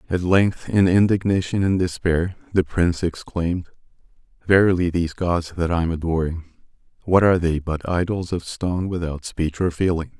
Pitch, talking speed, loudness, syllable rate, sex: 85 Hz, 160 wpm, -21 LUFS, 5.2 syllables/s, male